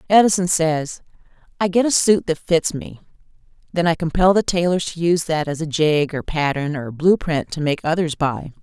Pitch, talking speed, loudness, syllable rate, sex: 165 Hz, 200 wpm, -19 LUFS, 5.1 syllables/s, female